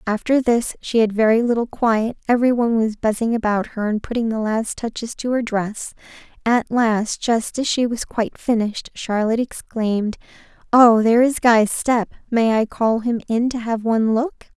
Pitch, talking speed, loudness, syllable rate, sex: 230 Hz, 185 wpm, -19 LUFS, 5.0 syllables/s, female